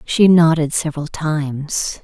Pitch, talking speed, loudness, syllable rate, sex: 155 Hz, 120 wpm, -16 LUFS, 4.2 syllables/s, female